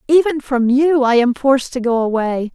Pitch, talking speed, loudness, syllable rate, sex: 260 Hz, 210 wpm, -15 LUFS, 5.1 syllables/s, female